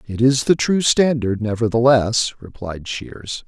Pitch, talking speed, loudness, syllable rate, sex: 120 Hz, 140 wpm, -18 LUFS, 4.0 syllables/s, male